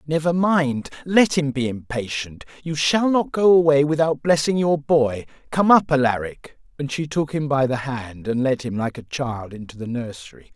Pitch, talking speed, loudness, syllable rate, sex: 140 Hz, 195 wpm, -20 LUFS, 4.7 syllables/s, male